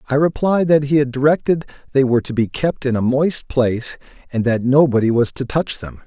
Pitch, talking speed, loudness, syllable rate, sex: 135 Hz, 215 wpm, -17 LUFS, 5.6 syllables/s, male